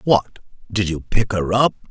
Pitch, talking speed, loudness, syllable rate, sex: 105 Hz, 190 wpm, -20 LUFS, 4.3 syllables/s, male